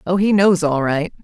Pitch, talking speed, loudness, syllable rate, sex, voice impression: 175 Hz, 245 wpm, -16 LUFS, 4.9 syllables/s, female, feminine, slightly gender-neutral, slightly young, adult-like, slightly thin, slightly relaxed, slightly weak, slightly dark, soft, clear, slightly fluent, slightly cool, intellectual, sincere, calm, slightly friendly, slightly reassuring, slightly elegant, kind, modest